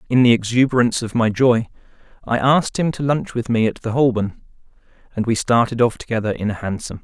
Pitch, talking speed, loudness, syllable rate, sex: 120 Hz, 205 wpm, -19 LUFS, 6.1 syllables/s, male